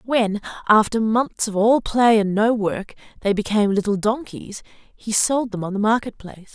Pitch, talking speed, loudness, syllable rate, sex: 215 Hz, 185 wpm, -20 LUFS, 4.6 syllables/s, female